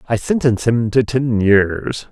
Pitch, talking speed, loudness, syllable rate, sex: 115 Hz, 170 wpm, -16 LUFS, 4.2 syllables/s, male